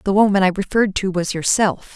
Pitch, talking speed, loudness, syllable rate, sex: 195 Hz, 215 wpm, -18 LUFS, 6.1 syllables/s, female